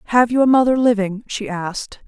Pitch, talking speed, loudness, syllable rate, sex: 225 Hz, 205 wpm, -17 LUFS, 5.8 syllables/s, female